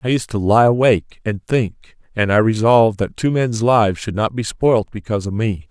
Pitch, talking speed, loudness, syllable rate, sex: 110 Hz, 220 wpm, -17 LUFS, 5.2 syllables/s, male